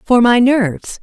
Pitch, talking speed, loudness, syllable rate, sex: 235 Hz, 175 wpm, -13 LUFS, 4.4 syllables/s, female